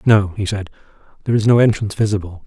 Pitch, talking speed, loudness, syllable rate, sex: 105 Hz, 195 wpm, -17 LUFS, 7.4 syllables/s, male